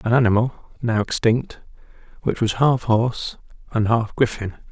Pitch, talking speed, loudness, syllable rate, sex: 115 Hz, 140 wpm, -21 LUFS, 4.7 syllables/s, male